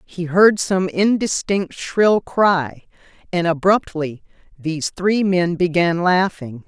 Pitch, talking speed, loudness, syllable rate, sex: 180 Hz, 115 wpm, -18 LUFS, 3.5 syllables/s, female